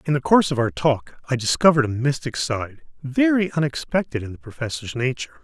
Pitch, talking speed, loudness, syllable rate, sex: 140 Hz, 190 wpm, -21 LUFS, 6.2 syllables/s, male